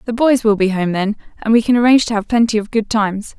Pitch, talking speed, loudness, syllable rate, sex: 220 Hz, 285 wpm, -15 LUFS, 6.7 syllables/s, female